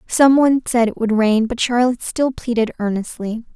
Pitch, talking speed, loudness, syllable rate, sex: 235 Hz, 185 wpm, -17 LUFS, 5.3 syllables/s, female